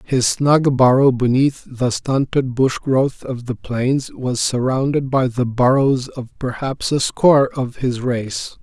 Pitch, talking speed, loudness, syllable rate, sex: 130 Hz, 160 wpm, -18 LUFS, 3.7 syllables/s, male